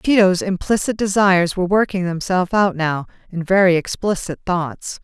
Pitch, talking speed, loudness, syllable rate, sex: 185 Hz, 145 wpm, -18 LUFS, 5.2 syllables/s, female